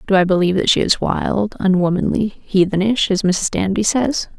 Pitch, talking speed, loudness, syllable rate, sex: 195 Hz, 180 wpm, -17 LUFS, 5.1 syllables/s, female